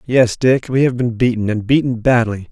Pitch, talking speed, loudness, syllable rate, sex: 120 Hz, 215 wpm, -16 LUFS, 5.0 syllables/s, male